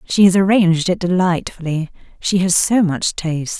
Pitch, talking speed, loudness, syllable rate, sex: 180 Hz, 165 wpm, -16 LUFS, 5.0 syllables/s, female